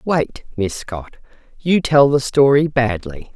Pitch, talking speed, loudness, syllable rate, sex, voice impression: 130 Hz, 145 wpm, -17 LUFS, 3.7 syllables/s, female, masculine, adult-like, slightly tensed, slightly dark, slightly hard, muffled, calm, reassuring, slightly unique, kind, modest